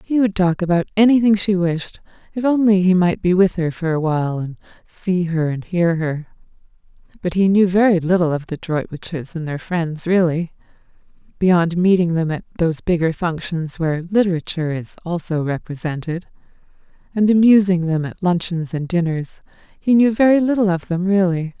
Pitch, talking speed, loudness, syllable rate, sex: 175 Hz, 165 wpm, -18 LUFS, 5.1 syllables/s, female